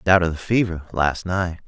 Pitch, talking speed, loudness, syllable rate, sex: 90 Hz, 215 wpm, -21 LUFS, 4.9 syllables/s, male